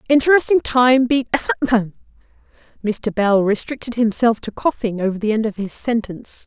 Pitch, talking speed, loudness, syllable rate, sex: 235 Hz, 140 wpm, -18 LUFS, 5.1 syllables/s, female